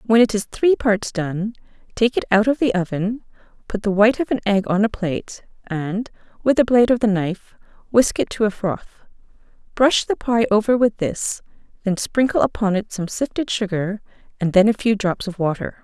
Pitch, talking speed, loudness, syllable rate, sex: 210 Hz, 200 wpm, -20 LUFS, 5.2 syllables/s, female